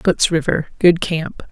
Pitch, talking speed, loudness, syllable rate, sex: 165 Hz, 120 wpm, -17 LUFS, 3.8 syllables/s, female